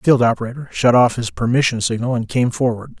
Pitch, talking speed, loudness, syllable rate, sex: 120 Hz, 220 wpm, -17 LUFS, 6.2 syllables/s, male